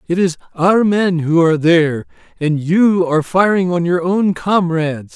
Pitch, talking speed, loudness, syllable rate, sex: 175 Hz, 175 wpm, -15 LUFS, 4.6 syllables/s, male